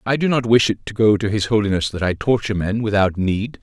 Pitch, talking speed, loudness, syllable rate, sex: 105 Hz, 265 wpm, -18 LUFS, 6.0 syllables/s, male